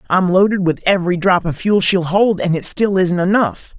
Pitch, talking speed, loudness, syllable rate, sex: 185 Hz, 220 wpm, -15 LUFS, 5.1 syllables/s, male